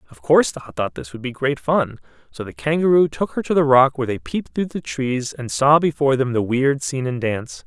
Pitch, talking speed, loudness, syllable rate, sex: 135 Hz, 250 wpm, -20 LUFS, 5.8 syllables/s, male